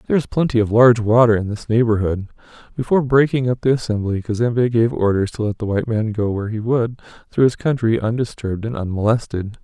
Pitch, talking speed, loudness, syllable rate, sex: 115 Hz, 200 wpm, -18 LUFS, 6.4 syllables/s, male